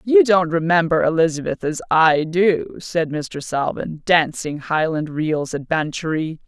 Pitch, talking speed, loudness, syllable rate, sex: 160 Hz, 140 wpm, -19 LUFS, 4.1 syllables/s, female